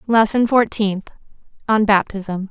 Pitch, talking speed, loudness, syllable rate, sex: 210 Hz, 95 wpm, -17 LUFS, 3.9 syllables/s, female